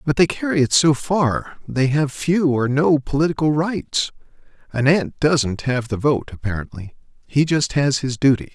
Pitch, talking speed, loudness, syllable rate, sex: 140 Hz, 175 wpm, -19 LUFS, 4.5 syllables/s, male